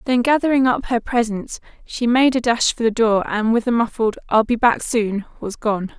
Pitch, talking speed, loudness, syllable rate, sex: 230 Hz, 220 wpm, -18 LUFS, 4.9 syllables/s, female